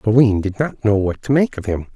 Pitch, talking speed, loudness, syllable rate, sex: 110 Hz, 275 wpm, -18 LUFS, 5.9 syllables/s, male